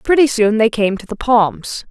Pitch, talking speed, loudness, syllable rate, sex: 225 Hz, 220 wpm, -15 LUFS, 4.4 syllables/s, female